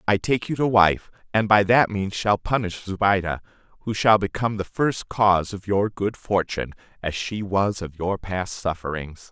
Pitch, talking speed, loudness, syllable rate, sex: 100 Hz, 185 wpm, -23 LUFS, 4.8 syllables/s, male